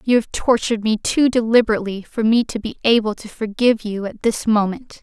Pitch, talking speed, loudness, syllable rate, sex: 220 Hz, 205 wpm, -19 LUFS, 5.9 syllables/s, female